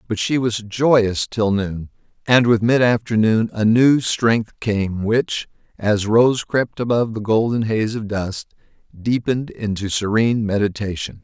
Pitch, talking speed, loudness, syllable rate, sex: 110 Hz, 150 wpm, -19 LUFS, 4.1 syllables/s, male